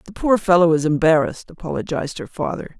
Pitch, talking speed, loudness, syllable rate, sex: 165 Hz, 170 wpm, -19 LUFS, 6.5 syllables/s, female